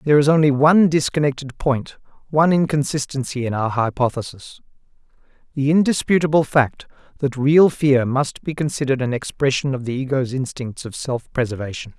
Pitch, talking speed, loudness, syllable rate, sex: 135 Hz, 145 wpm, -19 LUFS, 5.6 syllables/s, male